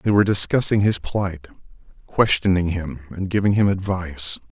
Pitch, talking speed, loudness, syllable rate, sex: 95 Hz, 145 wpm, -20 LUFS, 5.2 syllables/s, male